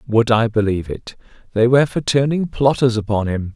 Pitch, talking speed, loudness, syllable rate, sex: 115 Hz, 185 wpm, -17 LUFS, 5.6 syllables/s, male